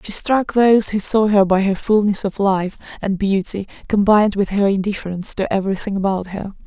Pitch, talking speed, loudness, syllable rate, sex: 200 Hz, 190 wpm, -18 LUFS, 5.6 syllables/s, female